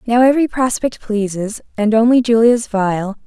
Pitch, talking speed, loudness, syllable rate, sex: 225 Hz, 145 wpm, -15 LUFS, 4.8 syllables/s, female